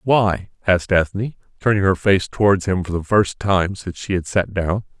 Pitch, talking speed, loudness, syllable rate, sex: 95 Hz, 205 wpm, -19 LUFS, 5.1 syllables/s, male